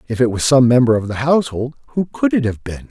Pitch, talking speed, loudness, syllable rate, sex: 125 Hz, 270 wpm, -16 LUFS, 6.3 syllables/s, male